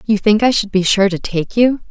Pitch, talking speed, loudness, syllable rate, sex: 210 Hz, 285 wpm, -15 LUFS, 5.3 syllables/s, female